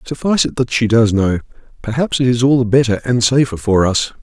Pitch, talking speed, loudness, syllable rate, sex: 120 Hz, 215 wpm, -15 LUFS, 5.8 syllables/s, male